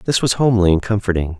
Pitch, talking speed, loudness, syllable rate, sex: 100 Hz, 215 wpm, -16 LUFS, 6.7 syllables/s, male